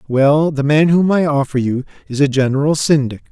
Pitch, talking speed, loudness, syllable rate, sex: 145 Hz, 200 wpm, -15 LUFS, 5.2 syllables/s, male